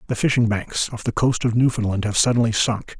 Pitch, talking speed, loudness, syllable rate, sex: 115 Hz, 220 wpm, -20 LUFS, 5.8 syllables/s, male